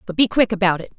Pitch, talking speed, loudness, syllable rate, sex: 200 Hz, 305 wpm, -18 LUFS, 7.2 syllables/s, female